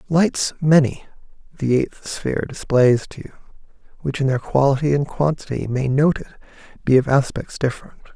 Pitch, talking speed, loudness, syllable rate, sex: 140 Hz, 145 wpm, -20 LUFS, 5.2 syllables/s, male